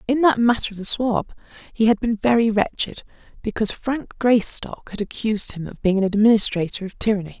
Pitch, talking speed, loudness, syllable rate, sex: 215 Hz, 185 wpm, -21 LUFS, 5.9 syllables/s, female